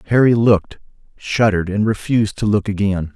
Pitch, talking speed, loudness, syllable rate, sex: 105 Hz, 150 wpm, -17 LUFS, 5.8 syllables/s, male